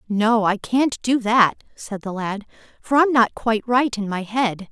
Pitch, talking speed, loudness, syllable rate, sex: 225 Hz, 205 wpm, -20 LUFS, 4.2 syllables/s, female